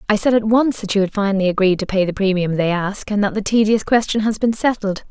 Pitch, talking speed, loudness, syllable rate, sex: 205 Hz, 270 wpm, -18 LUFS, 6.1 syllables/s, female